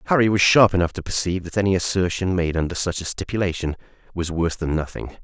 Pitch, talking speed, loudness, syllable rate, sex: 90 Hz, 205 wpm, -21 LUFS, 6.7 syllables/s, male